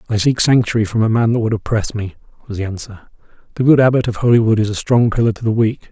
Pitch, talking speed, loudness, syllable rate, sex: 110 Hz, 255 wpm, -16 LUFS, 6.8 syllables/s, male